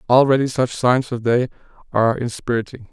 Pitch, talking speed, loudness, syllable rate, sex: 125 Hz, 145 wpm, -19 LUFS, 5.7 syllables/s, male